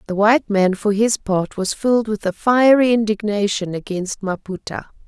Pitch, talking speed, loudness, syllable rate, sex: 210 Hz, 165 wpm, -18 LUFS, 4.8 syllables/s, female